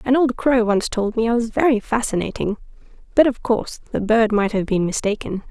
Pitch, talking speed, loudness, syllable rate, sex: 225 Hz, 205 wpm, -20 LUFS, 5.5 syllables/s, female